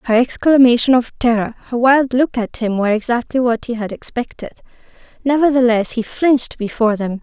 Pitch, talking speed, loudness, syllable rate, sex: 240 Hz, 165 wpm, -16 LUFS, 5.7 syllables/s, female